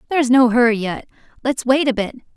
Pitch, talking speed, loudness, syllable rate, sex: 245 Hz, 205 wpm, -17 LUFS, 6.2 syllables/s, female